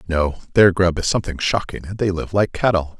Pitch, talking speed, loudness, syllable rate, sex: 90 Hz, 220 wpm, -19 LUFS, 5.6 syllables/s, male